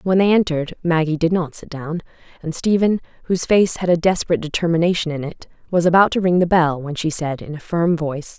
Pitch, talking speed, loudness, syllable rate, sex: 165 Hz, 220 wpm, -19 LUFS, 6.1 syllables/s, female